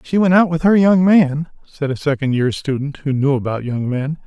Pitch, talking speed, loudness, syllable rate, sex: 150 Hz, 240 wpm, -17 LUFS, 5.2 syllables/s, male